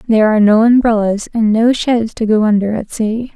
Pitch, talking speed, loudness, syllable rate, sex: 220 Hz, 215 wpm, -13 LUFS, 5.4 syllables/s, female